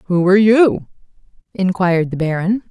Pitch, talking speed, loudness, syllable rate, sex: 190 Hz, 135 wpm, -15 LUFS, 5.5 syllables/s, female